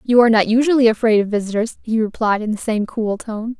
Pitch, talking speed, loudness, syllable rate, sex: 225 Hz, 235 wpm, -17 LUFS, 6.1 syllables/s, female